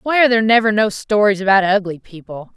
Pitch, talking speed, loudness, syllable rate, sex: 205 Hz, 210 wpm, -14 LUFS, 6.4 syllables/s, female